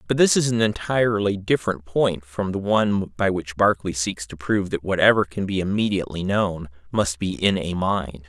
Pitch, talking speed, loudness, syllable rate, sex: 95 Hz, 195 wpm, -22 LUFS, 5.3 syllables/s, male